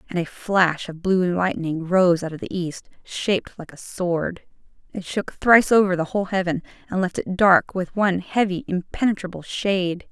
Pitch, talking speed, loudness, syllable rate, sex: 185 Hz, 185 wpm, -22 LUFS, 4.9 syllables/s, female